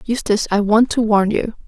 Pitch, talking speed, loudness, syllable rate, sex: 215 Hz, 215 wpm, -16 LUFS, 5.6 syllables/s, female